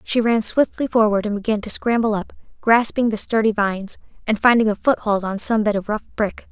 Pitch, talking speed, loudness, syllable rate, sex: 215 Hz, 210 wpm, -19 LUFS, 5.6 syllables/s, female